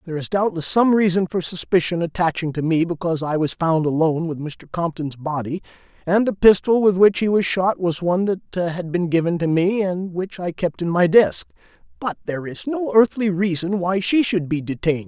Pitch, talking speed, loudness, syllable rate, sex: 170 Hz, 210 wpm, -20 LUFS, 5.4 syllables/s, male